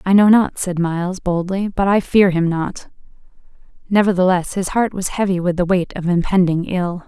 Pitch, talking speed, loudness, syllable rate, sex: 185 Hz, 185 wpm, -17 LUFS, 5.1 syllables/s, female